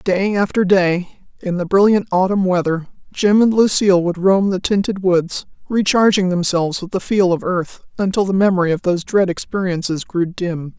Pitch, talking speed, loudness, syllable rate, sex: 185 Hz, 180 wpm, -17 LUFS, 5.0 syllables/s, female